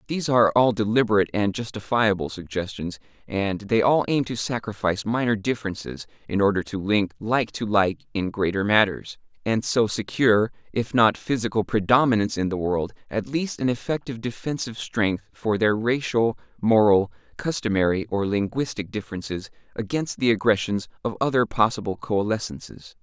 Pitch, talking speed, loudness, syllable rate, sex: 110 Hz, 145 wpm, -23 LUFS, 5.4 syllables/s, male